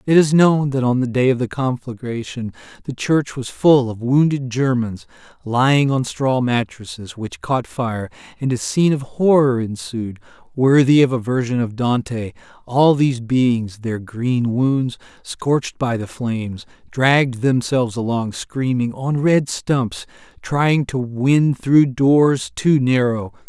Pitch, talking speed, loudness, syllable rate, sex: 130 Hz, 155 wpm, -18 LUFS, 4.0 syllables/s, male